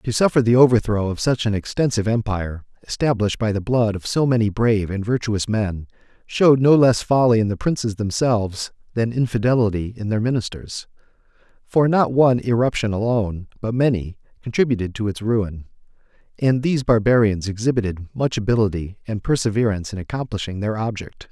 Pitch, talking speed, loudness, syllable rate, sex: 110 Hz, 160 wpm, -20 LUFS, 5.8 syllables/s, male